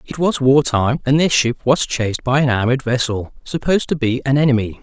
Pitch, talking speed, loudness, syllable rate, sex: 130 Hz, 225 wpm, -17 LUFS, 5.5 syllables/s, male